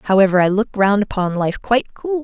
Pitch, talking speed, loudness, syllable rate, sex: 210 Hz, 215 wpm, -17 LUFS, 5.4 syllables/s, female